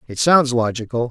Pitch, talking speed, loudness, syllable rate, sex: 125 Hz, 165 wpm, -17 LUFS, 5.3 syllables/s, male